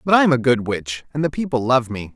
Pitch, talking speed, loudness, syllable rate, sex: 130 Hz, 305 wpm, -19 LUFS, 6.1 syllables/s, male